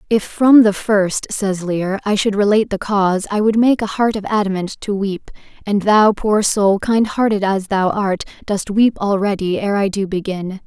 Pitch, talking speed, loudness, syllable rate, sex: 205 Hz, 205 wpm, -16 LUFS, 4.6 syllables/s, female